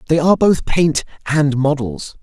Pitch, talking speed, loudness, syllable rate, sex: 150 Hz, 160 wpm, -16 LUFS, 4.6 syllables/s, male